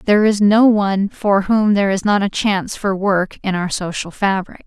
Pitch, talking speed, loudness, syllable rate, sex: 200 Hz, 220 wpm, -16 LUFS, 5.0 syllables/s, female